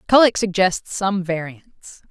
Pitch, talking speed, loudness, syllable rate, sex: 190 Hz, 115 wpm, -19 LUFS, 3.8 syllables/s, female